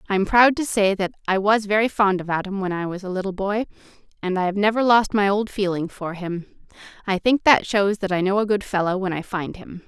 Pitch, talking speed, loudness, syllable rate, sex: 200 Hz, 245 wpm, -21 LUFS, 5.5 syllables/s, female